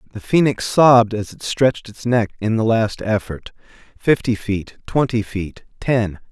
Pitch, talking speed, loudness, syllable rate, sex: 110 Hz, 160 wpm, -18 LUFS, 4.5 syllables/s, male